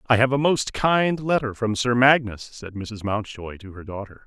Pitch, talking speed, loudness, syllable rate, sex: 120 Hz, 210 wpm, -21 LUFS, 4.7 syllables/s, male